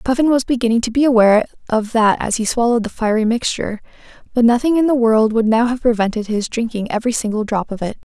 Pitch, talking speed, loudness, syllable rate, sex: 230 Hz, 220 wpm, -16 LUFS, 6.6 syllables/s, female